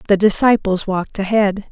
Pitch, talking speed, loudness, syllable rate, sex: 200 Hz, 140 wpm, -16 LUFS, 5.4 syllables/s, female